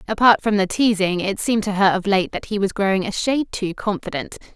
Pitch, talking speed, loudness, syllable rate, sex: 200 Hz, 235 wpm, -20 LUFS, 6.0 syllables/s, female